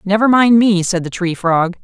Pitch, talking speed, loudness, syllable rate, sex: 195 Hz, 230 wpm, -14 LUFS, 4.7 syllables/s, female